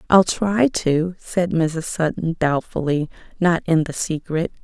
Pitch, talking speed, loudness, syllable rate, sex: 170 Hz, 130 wpm, -20 LUFS, 3.8 syllables/s, female